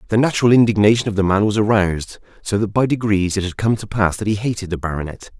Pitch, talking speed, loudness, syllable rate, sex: 105 Hz, 245 wpm, -18 LUFS, 6.7 syllables/s, male